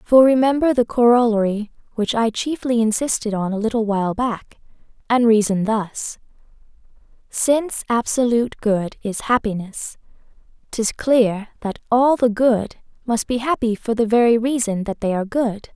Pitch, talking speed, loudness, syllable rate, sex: 230 Hz, 145 wpm, -19 LUFS, 4.7 syllables/s, female